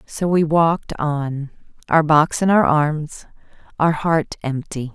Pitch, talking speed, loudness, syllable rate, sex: 155 Hz, 145 wpm, -18 LUFS, 3.6 syllables/s, female